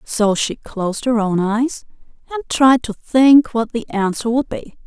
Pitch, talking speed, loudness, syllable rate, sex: 235 Hz, 185 wpm, -17 LUFS, 4.1 syllables/s, female